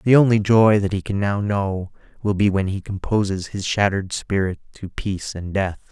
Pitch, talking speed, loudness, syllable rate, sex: 100 Hz, 205 wpm, -21 LUFS, 5.0 syllables/s, male